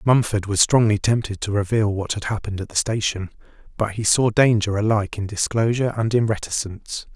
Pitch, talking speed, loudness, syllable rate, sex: 105 Hz, 185 wpm, -21 LUFS, 5.9 syllables/s, male